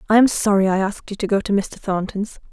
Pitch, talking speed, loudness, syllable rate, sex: 205 Hz, 260 wpm, -20 LUFS, 6.3 syllables/s, female